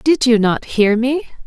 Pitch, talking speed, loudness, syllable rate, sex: 240 Hz, 205 wpm, -15 LUFS, 3.8 syllables/s, female